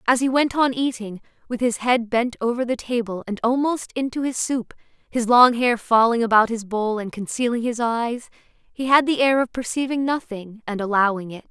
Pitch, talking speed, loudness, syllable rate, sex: 235 Hz, 200 wpm, -21 LUFS, 5.0 syllables/s, female